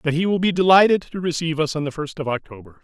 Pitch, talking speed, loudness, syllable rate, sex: 160 Hz, 275 wpm, -20 LUFS, 6.8 syllables/s, male